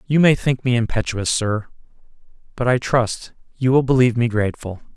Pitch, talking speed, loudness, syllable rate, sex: 120 Hz, 170 wpm, -19 LUFS, 5.4 syllables/s, male